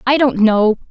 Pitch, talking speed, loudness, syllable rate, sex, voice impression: 240 Hz, 200 wpm, -14 LUFS, 4.4 syllables/s, female, feminine, slightly young, relaxed, slightly weak, slightly dark, soft, fluent, raspy, intellectual, calm, reassuring, kind, modest